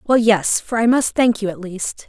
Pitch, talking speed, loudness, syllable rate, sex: 215 Hz, 260 wpm, -18 LUFS, 4.7 syllables/s, female